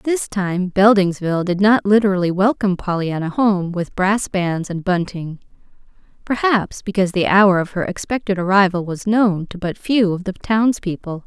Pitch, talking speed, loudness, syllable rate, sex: 190 Hz, 155 wpm, -18 LUFS, 4.8 syllables/s, female